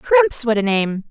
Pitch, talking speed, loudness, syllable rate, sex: 245 Hz, 215 wpm, -17 LUFS, 3.7 syllables/s, female